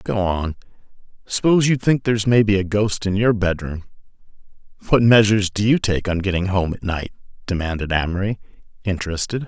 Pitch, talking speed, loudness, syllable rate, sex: 100 Hz, 150 wpm, -19 LUFS, 5.6 syllables/s, male